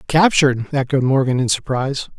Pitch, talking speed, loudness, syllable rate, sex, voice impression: 135 Hz, 135 wpm, -17 LUFS, 5.8 syllables/s, male, very masculine, very middle-aged, slightly thick, slightly tensed, slightly powerful, slightly dark, slightly hard, slightly clear, fluent, slightly raspy, cool, intellectual, slightly refreshing, sincere, calm, mature, friendly, reassuring, unique, slightly elegant, wild, slightly sweet, lively, slightly strict, slightly intense